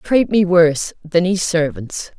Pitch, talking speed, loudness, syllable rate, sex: 170 Hz, 165 wpm, -16 LUFS, 4.0 syllables/s, female